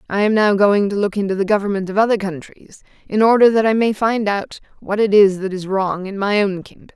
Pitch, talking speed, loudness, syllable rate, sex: 205 Hz, 250 wpm, -17 LUFS, 5.7 syllables/s, female